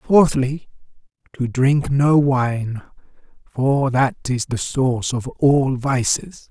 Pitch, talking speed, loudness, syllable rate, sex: 135 Hz, 120 wpm, -19 LUFS, 3.1 syllables/s, male